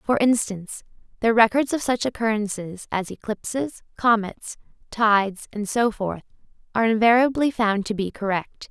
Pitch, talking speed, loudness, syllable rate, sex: 220 Hz, 140 wpm, -22 LUFS, 4.8 syllables/s, female